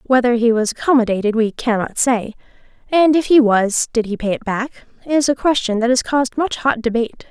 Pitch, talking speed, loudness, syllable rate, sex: 240 Hz, 215 wpm, -17 LUFS, 5.5 syllables/s, female